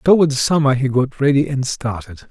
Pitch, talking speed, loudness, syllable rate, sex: 135 Hz, 180 wpm, -17 LUFS, 5.0 syllables/s, male